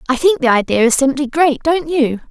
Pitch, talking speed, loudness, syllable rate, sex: 280 Hz, 235 wpm, -14 LUFS, 5.5 syllables/s, female